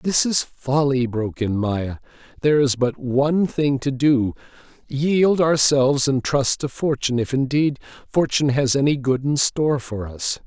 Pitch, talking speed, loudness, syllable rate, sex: 135 Hz, 165 wpm, -20 LUFS, 4.6 syllables/s, male